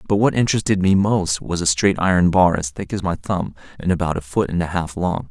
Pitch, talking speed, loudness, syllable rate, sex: 90 Hz, 260 wpm, -19 LUFS, 5.7 syllables/s, male